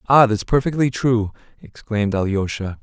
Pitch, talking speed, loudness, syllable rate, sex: 110 Hz, 125 wpm, -19 LUFS, 5.1 syllables/s, male